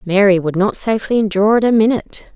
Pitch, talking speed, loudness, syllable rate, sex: 205 Hz, 205 wpm, -15 LUFS, 6.9 syllables/s, female